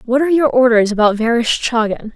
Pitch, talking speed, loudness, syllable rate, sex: 240 Hz, 165 wpm, -14 LUFS, 5.9 syllables/s, female